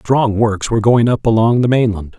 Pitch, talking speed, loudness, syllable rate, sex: 110 Hz, 220 wpm, -14 LUFS, 5.1 syllables/s, male